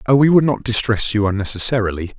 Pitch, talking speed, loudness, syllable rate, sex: 115 Hz, 190 wpm, -17 LUFS, 6.5 syllables/s, male